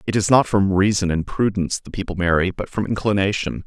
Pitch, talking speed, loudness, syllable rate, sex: 100 Hz, 215 wpm, -20 LUFS, 6.0 syllables/s, male